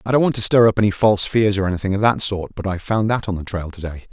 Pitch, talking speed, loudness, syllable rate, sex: 100 Hz, 320 wpm, -18 LUFS, 6.8 syllables/s, male